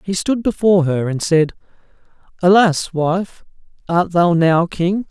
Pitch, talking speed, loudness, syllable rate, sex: 175 Hz, 140 wpm, -16 LUFS, 4.1 syllables/s, male